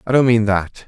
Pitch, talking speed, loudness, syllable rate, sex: 110 Hz, 275 wpm, -16 LUFS, 5.5 syllables/s, male